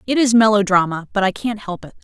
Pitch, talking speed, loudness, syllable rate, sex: 205 Hz, 235 wpm, -17 LUFS, 6.1 syllables/s, female